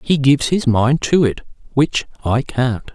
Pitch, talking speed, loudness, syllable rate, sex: 130 Hz, 165 wpm, -17 LUFS, 4.3 syllables/s, male